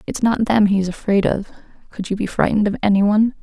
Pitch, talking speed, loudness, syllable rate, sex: 205 Hz, 210 wpm, -18 LUFS, 6.4 syllables/s, female